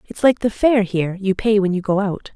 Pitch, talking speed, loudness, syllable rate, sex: 200 Hz, 280 wpm, -18 LUFS, 5.6 syllables/s, female